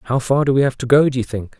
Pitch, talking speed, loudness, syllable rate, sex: 130 Hz, 375 wpm, -17 LUFS, 6.5 syllables/s, male